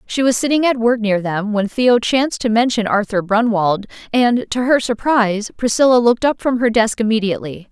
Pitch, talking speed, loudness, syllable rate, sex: 230 Hz, 195 wpm, -16 LUFS, 5.6 syllables/s, female